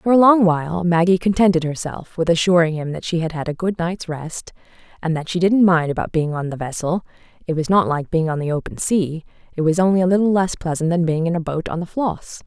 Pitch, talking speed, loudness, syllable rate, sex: 170 Hz, 245 wpm, -19 LUFS, 5.8 syllables/s, female